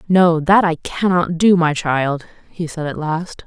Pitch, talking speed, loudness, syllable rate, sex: 165 Hz, 190 wpm, -17 LUFS, 3.9 syllables/s, female